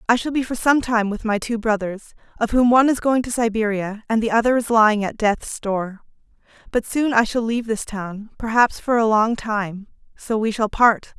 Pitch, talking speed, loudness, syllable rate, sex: 225 Hz, 220 wpm, -20 LUFS, 5.1 syllables/s, female